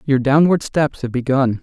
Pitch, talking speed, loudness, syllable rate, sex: 135 Hz, 185 wpm, -17 LUFS, 4.6 syllables/s, male